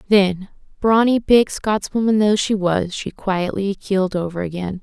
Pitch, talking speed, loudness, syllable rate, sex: 200 Hz, 150 wpm, -19 LUFS, 4.4 syllables/s, female